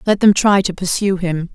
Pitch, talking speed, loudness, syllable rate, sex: 190 Hz, 235 wpm, -16 LUFS, 5.0 syllables/s, female